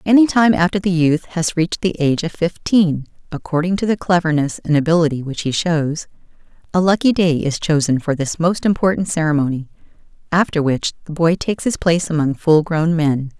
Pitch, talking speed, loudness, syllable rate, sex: 165 Hz, 185 wpm, -17 LUFS, 5.5 syllables/s, female